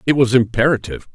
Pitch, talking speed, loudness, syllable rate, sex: 120 Hz, 155 wpm, -16 LUFS, 7.1 syllables/s, male